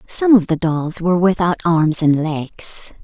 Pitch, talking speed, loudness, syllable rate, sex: 170 Hz, 180 wpm, -17 LUFS, 4.0 syllables/s, female